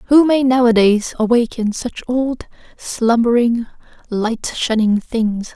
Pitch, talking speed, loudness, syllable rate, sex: 235 Hz, 110 wpm, -16 LUFS, 3.6 syllables/s, female